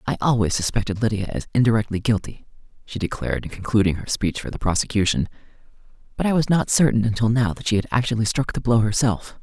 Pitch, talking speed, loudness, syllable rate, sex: 110 Hz, 195 wpm, -21 LUFS, 6.5 syllables/s, male